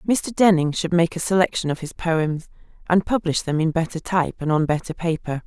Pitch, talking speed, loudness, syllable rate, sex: 170 Hz, 210 wpm, -21 LUFS, 5.5 syllables/s, female